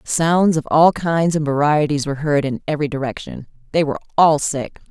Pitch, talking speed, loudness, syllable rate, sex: 150 Hz, 185 wpm, -18 LUFS, 5.4 syllables/s, female